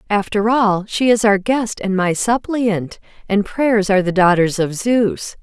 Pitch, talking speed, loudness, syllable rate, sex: 210 Hz, 175 wpm, -16 LUFS, 4.1 syllables/s, female